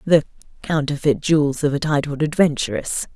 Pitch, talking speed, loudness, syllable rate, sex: 150 Hz, 135 wpm, -20 LUFS, 5.3 syllables/s, female